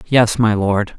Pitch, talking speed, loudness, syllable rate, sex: 110 Hz, 185 wpm, -16 LUFS, 3.5 syllables/s, female